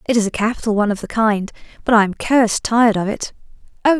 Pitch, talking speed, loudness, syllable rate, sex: 220 Hz, 240 wpm, -17 LUFS, 6.8 syllables/s, female